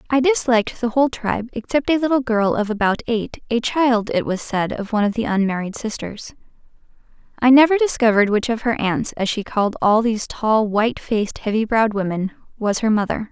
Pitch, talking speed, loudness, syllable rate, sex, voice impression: 225 Hz, 200 wpm, -19 LUFS, 5.8 syllables/s, female, feminine, slightly young, slightly relaxed, bright, soft, clear, raspy, slightly cute, intellectual, friendly, reassuring, elegant, kind, modest